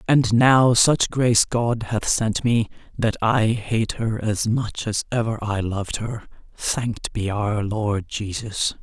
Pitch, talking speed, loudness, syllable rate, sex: 110 Hz, 165 wpm, -21 LUFS, 3.7 syllables/s, female